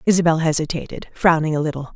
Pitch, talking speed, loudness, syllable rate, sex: 160 Hz, 155 wpm, -19 LUFS, 6.7 syllables/s, female